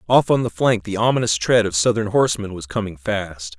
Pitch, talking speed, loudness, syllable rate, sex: 105 Hz, 220 wpm, -19 LUFS, 5.6 syllables/s, male